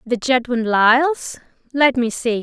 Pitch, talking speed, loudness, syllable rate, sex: 250 Hz, 125 wpm, -17 LUFS, 4.3 syllables/s, female